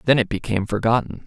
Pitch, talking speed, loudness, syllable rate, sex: 115 Hz, 190 wpm, -21 LUFS, 7.1 syllables/s, male